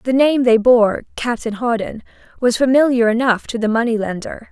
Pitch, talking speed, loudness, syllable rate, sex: 235 Hz, 175 wpm, -16 LUFS, 5.1 syllables/s, female